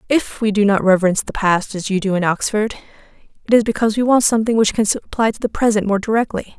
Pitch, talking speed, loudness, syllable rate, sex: 210 Hz, 235 wpm, -17 LUFS, 6.9 syllables/s, female